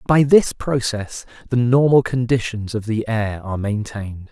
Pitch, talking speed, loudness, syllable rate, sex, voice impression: 115 Hz, 155 wpm, -19 LUFS, 4.6 syllables/s, male, masculine, adult-like, fluent, slightly cool, refreshing, slightly sincere